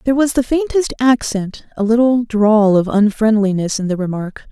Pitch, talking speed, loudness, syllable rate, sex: 225 Hz, 175 wpm, -15 LUFS, 4.9 syllables/s, female